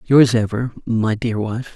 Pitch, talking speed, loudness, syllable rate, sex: 115 Hz, 170 wpm, -19 LUFS, 3.9 syllables/s, male